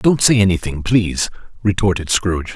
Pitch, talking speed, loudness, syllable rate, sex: 100 Hz, 140 wpm, -17 LUFS, 5.5 syllables/s, male